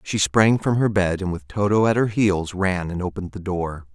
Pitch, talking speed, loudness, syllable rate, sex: 95 Hz, 245 wpm, -21 LUFS, 5.0 syllables/s, male